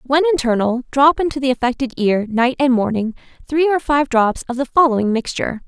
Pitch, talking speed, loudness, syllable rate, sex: 260 Hz, 190 wpm, -17 LUFS, 5.6 syllables/s, female